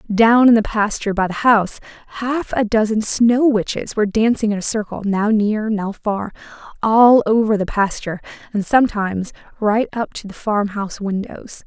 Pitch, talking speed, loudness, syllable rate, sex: 215 Hz, 175 wpm, -17 LUFS, 5.0 syllables/s, female